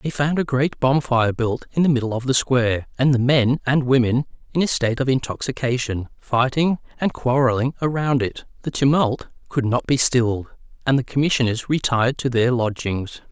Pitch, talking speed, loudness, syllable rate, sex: 130 Hz, 180 wpm, -20 LUFS, 5.3 syllables/s, male